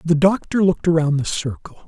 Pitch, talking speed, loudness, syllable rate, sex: 165 Hz, 190 wpm, -19 LUFS, 5.8 syllables/s, male